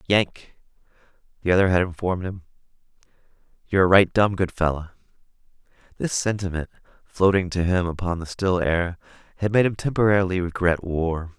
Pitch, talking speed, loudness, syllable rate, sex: 90 Hz, 140 wpm, -22 LUFS, 5.5 syllables/s, male